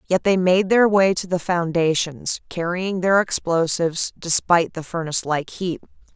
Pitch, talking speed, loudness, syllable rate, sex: 175 Hz, 155 wpm, -20 LUFS, 4.7 syllables/s, female